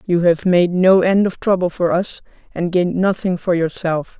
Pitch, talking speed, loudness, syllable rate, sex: 180 Hz, 200 wpm, -17 LUFS, 4.8 syllables/s, female